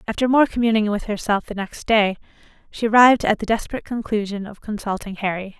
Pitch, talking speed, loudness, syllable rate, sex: 215 Hz, 170 wpm, -20 LUFS, 6.1 syllables/s, female